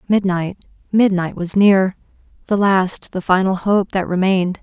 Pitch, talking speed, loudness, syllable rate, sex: 190 Hz, 130 wpm, -17 LUFS, 4.5 syllables/s, female